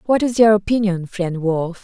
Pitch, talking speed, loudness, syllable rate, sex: 195 Hz, 195 wpm, -17 LUFS, 4.7 syllables/s, female